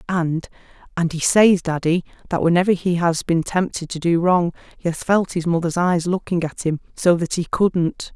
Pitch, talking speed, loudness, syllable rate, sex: 170 Hz, 190 wpm, -20 LUFS, 4.8 syllables/s, female